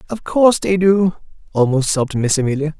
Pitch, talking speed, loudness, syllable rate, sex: 160 Hz, 170 wpm, -16 LUFS, 5.9 syllables/s, male